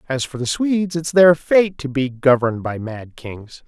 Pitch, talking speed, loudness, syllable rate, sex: 140 Hz, 210 wpm, -18 LUFS, 4.9 syllables/s, male